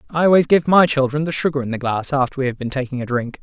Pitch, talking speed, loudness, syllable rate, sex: 140 Hz, 300 wpm, -18 LUFS, 6.8 syllables/s, male